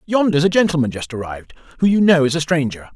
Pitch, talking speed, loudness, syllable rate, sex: 155 Hz, 225 wpm, -17 LUFS, 6.7 syllables/s, male